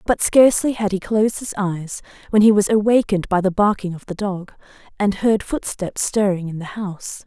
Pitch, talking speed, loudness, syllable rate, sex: 200 Hz, 200 wpm, -19 LUFS, 5.3 syllables/s, female